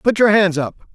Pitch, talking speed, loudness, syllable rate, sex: 190 Hz, 255 wpm, -15 LUFS, 5.3 syllables/s, male